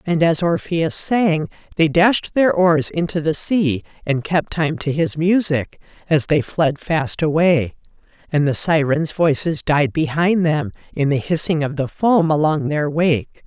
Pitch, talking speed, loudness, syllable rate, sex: 160 Hz, 170 wpm, -18 LUFS, 4.0 syllables/s, female